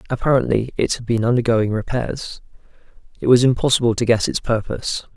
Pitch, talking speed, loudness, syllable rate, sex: 120 Hz, 150 wpm, -19 LUFS, 5.9 syllables/s, male